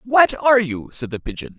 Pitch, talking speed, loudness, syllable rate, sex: 180 Hz, 230 wpm, -18 LUFS, 5.5 syllables/s, male